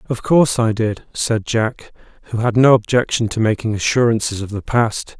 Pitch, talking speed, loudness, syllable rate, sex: 115 Hz, 185 wpm, -17 LUFS, 5.1 syllables/s, male